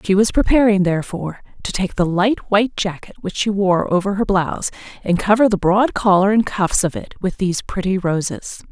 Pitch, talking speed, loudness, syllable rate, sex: 195 Hz, 200 wpm, -18 LUFS, 5.4 syllables/s, female